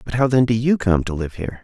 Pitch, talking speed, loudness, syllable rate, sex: 110 Hz, 330 wpm, -19 LUFS, 6.5 syllables/s, male